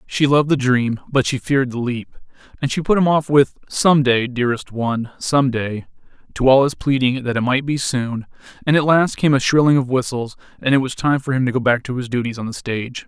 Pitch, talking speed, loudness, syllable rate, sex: 130 Hz, 245 wpm, -18 LUFS, 5.7 syllables/s, male